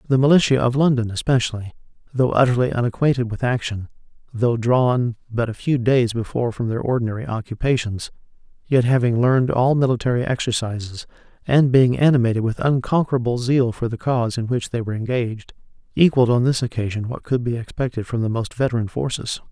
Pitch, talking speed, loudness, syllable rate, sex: 120 Hz, 165 wpm, -20 LUFS, 6.1 syllables/s, male